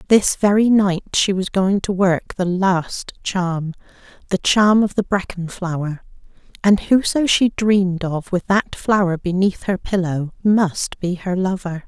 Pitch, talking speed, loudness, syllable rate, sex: 190 Hz, 150 wpm, -18 LUFS, 4.0 syllables/s, female